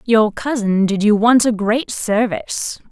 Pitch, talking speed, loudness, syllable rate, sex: 220 Hz, 165 wpm, -16 LUFS, 4.1 syllables/s, female